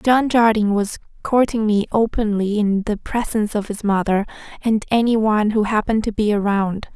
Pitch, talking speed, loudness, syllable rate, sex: 215 Hz, 175 wpm, -19 LUFS, 5.4 syllables/s, female